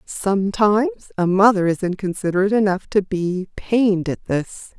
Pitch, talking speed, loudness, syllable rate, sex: 195 Hz, 140 wpm, -19 LUFS, 5.2 syllables/s, female